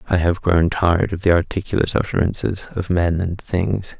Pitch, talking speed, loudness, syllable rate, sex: 90 Hz, 180 wpm, -19 LUFS, 5.3 syllables/s, male